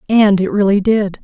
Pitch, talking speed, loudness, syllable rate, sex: 200 Hz, 195 wpm, -13 LUFS, 4.8 syllables/s, female